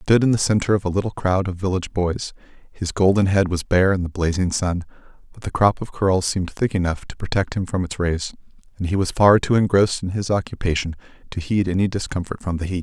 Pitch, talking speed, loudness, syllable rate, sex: 95 Hz, 240 wpm, -21 LUFS, 6.1 syllables/s, male